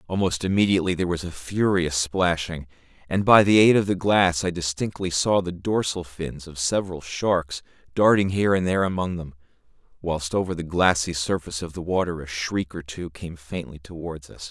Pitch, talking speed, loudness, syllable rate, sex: 85 Hz, 185 wpm, -23 LUFS, 5.3 syllables/s, male